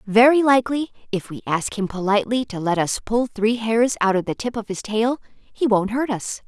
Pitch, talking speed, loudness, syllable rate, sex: 220 Hz, 220 wpm, -21 LUFS, 5.1 syllables/s, female